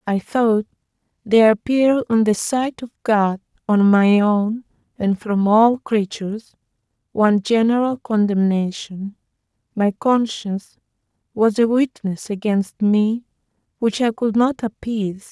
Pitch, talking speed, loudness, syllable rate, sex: 215 Hz, 120 wpm, -19 LUFS, 4.1 syllables/s, female